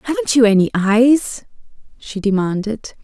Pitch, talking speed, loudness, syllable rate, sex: 220 Hz, 120 wpm, -15 LUFS, 4.4 syllables/s, female